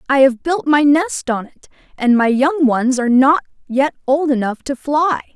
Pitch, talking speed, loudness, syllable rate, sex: 275 Hz, 200 wpm, -16 LUFS, 4.6 syllables/s, female